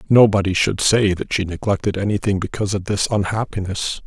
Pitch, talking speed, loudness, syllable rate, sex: 100 Hz, 160 wpm, -19 LUFS, 5.8 syllables/s, male